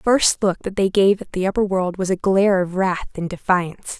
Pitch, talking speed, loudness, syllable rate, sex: 190 Hz, 255 wpm, -19 LUFS, 5.6 syllables/s, female